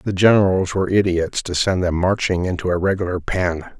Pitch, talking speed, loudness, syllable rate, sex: 90 Hz, 190 wpm, -19 LUFS, 5.5 syllables/s, male